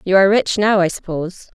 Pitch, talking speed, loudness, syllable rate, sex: 190 Hz, 230 wpm, -16 LUFS, 6.5 syllables/s, female